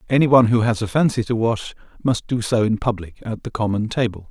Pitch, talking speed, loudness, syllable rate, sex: 115 Hz, 235 wpm, -20 LUFS, 6.0 syllables/s, male